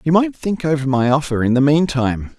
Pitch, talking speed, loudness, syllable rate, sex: 145 Hz, 225 wpm, -17 LUFS, 5.7 syllables/s, male